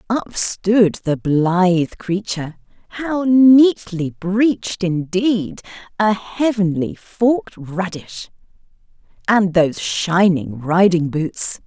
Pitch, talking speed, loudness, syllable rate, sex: 190 Hz, 80 wpm, -17 LUFS, 3.2 syllables/s, female